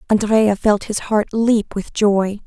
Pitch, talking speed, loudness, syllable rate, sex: 210 Hz, 170 wpm, -17 LUFS, 3.6 syllables/s, female